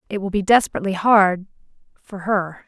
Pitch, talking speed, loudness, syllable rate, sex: 195 Hz, 135 wpm, -18 LUFS, 5.7 syllables/s, female